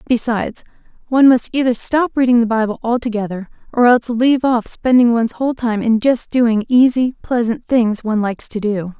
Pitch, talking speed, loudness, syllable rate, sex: 235 Hz, 180 wpm, -16 LUFS, 5.7 syllables/s, female